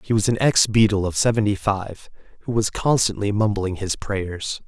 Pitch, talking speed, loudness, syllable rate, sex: 100 Hz, 180 wpm, -21 LUFS, 4.8 syllables/s, male